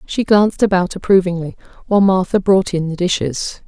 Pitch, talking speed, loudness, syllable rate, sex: 185 Hz, 165 wpm, -16 LUFS, 5.6 syllables/s, female